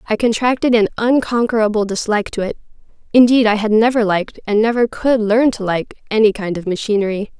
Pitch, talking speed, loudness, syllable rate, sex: 220 Hz, 180 wpm, -16 LUFS, 6.0 syllables/s, female